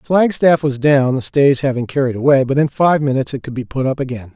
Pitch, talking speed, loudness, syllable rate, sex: 135 Hz, 260 wpm, -15 LUFS, 6.0 syllables/s, male